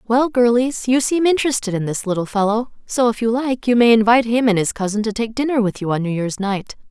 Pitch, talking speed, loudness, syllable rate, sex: 230 Hz, 250 wpm, -18 LUFS, 6.0 syllables/s, female